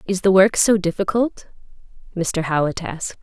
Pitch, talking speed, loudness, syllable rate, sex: 185 Hz, 150 wpm, -19 LUFS, 5.0 syllables/s, female